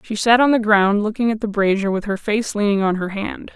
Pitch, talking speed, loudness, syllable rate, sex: 210 Hz, 270 wpm, -18 LUFS, 5.5 syllables/s, female